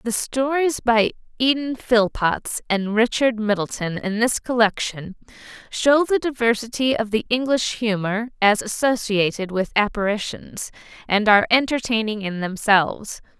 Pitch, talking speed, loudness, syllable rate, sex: 225 Hz, 120 wpm, -20 LUFS, 4.5 syllables/s, female